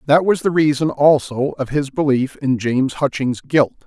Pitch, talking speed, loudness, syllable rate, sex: 140 Hz, 185 wpm, -17 LUFS, 4.7 syllables/s, male